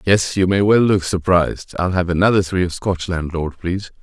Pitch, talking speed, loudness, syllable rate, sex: 90 Hz, 195 wpm, -18 LUFS, 5.4 syllables/s, male